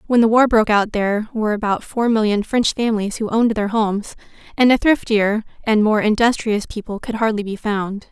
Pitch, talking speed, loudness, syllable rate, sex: 215 Hz, 200 wpm, -18 LUFS, 5.6 syllables/s, female